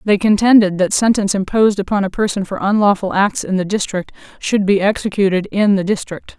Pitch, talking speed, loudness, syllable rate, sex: 200 Hz, 190 wpm, -15 LUFS, 5.8 syllables/s, female